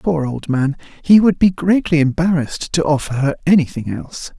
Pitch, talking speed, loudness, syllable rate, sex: 155 Hz, 180 wpm, -16 LUFS, 5.3 syllables/s, male